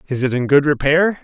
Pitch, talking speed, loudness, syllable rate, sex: 145 Hz, 245 wpm, -16 LUFS, 5.6 syllables/s, male